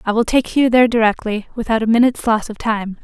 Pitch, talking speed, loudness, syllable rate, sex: 225 Hz, 240 wpm, -16 LUFS, 6.4 syllables/s, female